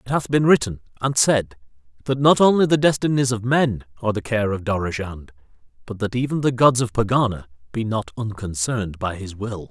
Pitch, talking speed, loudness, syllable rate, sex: 115 Hz, 190 wpm, -20 LUFS, 5.5 syllables/s, male